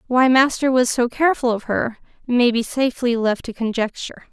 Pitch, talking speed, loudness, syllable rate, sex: 245 Hz, 180 wpm, -19 LUFS, 5.5 syllables/s, female